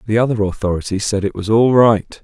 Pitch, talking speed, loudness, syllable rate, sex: 105 Hz, 215 wpm, -16 LUFS, 5.8 syllables/s, male